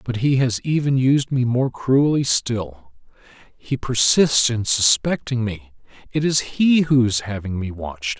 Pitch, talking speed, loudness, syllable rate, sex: 120 Hz, 160 wpm, -19 LUFS, 4.0 syllables/s, male